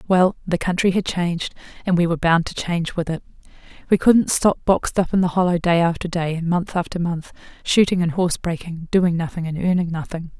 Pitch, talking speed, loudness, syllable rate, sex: 175 Hz, 215 wpm, -20 LUFS, 5.8 syllables/s, female